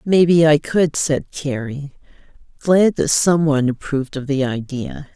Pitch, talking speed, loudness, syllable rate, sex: 145 Hz, 150 wpm, -18 LUFS, 4.4 syllables/s, female